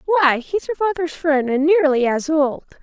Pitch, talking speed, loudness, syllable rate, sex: 310 Hz, 190 wpm, -18 LUFS, 5.3 syllables/s, female